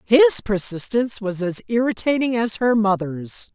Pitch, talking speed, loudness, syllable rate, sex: 220 Hz, 135 wpm, -19 LUFS, 4.8 syllables/s, female